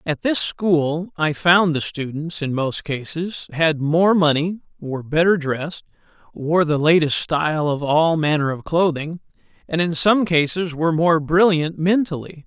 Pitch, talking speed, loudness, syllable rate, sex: 160 Hz, 160 wpm, -19 LUFS, 4.3 syllables/s, male